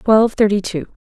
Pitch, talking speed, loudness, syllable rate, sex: 205 Hz, 165 wpm, -16 LUFS, 5.4 syllables/s, female